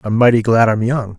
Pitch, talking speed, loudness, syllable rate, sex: 115 Hz, 255 wpm, -14 LUFS, 5.5 syllables/s, male